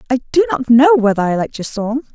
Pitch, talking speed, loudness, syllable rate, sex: 250 Hz, 250 wpm, -14 LUFS, 6.3 syllables/s, female